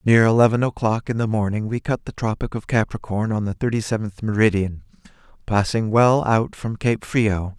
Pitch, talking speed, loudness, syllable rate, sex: 110 Hz, 180 wpm, -21 LUFS, 5.1 syllables/s, male